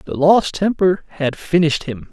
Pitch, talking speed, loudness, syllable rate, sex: 165 Hz, 170 wpm, -17 LUFS, 4.7 syllables/s, male